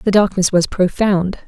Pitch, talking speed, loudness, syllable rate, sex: 190 Hz, 165 wpm, -16 LUFS, 4.7 syllables/s, female